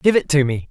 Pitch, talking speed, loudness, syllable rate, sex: 150 Hz, 340 wpm, -17 LUFS, 6.0 syllables/s, male